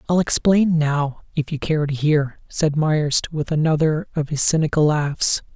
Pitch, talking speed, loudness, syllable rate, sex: 155 Hz, 175 wpm, -20 LUFS, 4.2 syllables/s, male